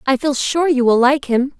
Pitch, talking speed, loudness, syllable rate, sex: 270 Hz, 265 wpm, -16 LUFS, 4.8 syllables/s, female